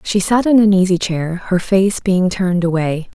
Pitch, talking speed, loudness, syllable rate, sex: 185 Hz, 205 wpm, -15 LUFS, 4.6 syllables/s, female